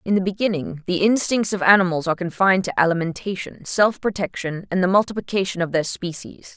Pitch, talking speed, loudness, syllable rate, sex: 185 Hz, 175 wpm, -21 LUFS, 6.0 syllables/s, female